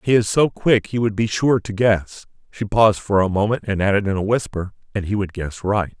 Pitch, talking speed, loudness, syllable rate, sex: 105 Hz, 250 wpm, -19 LUFS, 5.3 syllables/s, male